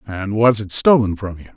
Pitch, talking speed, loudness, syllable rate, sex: 105 Hz, 230 wpm, -16 LUFS, 5.2 syllables/s, male